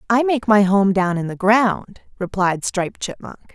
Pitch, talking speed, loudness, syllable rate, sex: 205 Hz, 185 wpm, -18 LUFS, 4.6 syllables/s, female